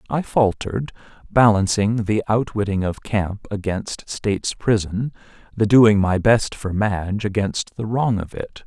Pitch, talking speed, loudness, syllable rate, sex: 105 Hz, 145 wpm, -20 LUFS, 4.2 syllables/s, male